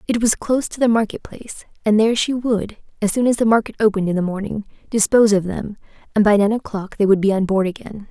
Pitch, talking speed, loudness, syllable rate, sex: 210 Hz, 235 wpm, -18 LUFS, 6.5 syllables/s, female